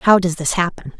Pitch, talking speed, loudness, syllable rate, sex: 175 Hz, 240 wpm, -18 LUFS, 5.4 syllables/s, female